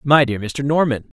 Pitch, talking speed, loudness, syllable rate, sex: 135 Hz, 205 wpm, -18 LUFS, 4.9 syllables/s, male